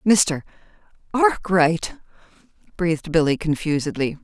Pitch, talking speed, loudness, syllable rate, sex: 170 Hz, 55 wpm, -21 LUFS, 5.1 syllables/s, female